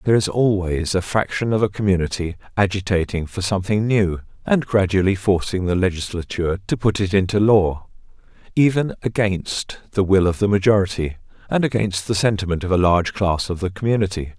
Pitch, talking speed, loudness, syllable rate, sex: 100 Hz, 165 wpm, -20 LUFS, 5.7 syllables/s, male